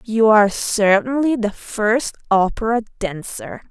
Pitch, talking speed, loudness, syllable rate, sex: 220 Hz, 115 wpm, -18 LUFS, 4.1 syllables/s, female